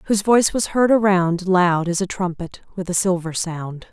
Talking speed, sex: 200 wpm, female